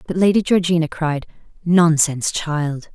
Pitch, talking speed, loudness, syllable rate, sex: 160 Hz, 120 wpm, -18 LUFS, 4.6 syllables/s, female